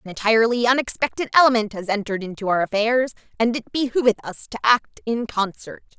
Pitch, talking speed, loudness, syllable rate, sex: 225 Hz, 170 wpm, -21 LUFS, 6.0 syllables/s, female